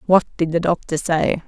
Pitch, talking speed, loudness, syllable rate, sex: 170 Hz, 205 wpm, -19 LUFS, 5.2 syllables/s, female